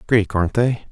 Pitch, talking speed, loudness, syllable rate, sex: 105 Hz, 195 wpm, -19 LUFS, 5.9 syllables/s, male